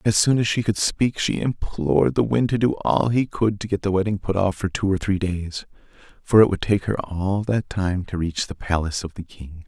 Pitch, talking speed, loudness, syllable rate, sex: 100 Hz, 255 wpm, -22 LUFS, 5.1 syllables/s, male